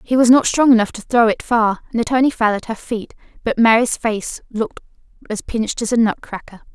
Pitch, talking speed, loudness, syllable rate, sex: 230 Hz, 220 wpm, -17 LUFS, 5.6 syllables/s, female